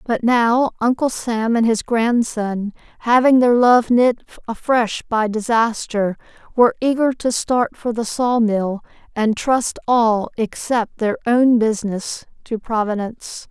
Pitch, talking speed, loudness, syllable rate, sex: 230 Hz, 140 wpm, -18 LUFS, 3.9 syllables/s, female